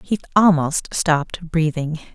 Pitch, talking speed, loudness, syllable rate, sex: 165 Hz, 110 wpm, -19 LUFS, 4.1 syllables/s, female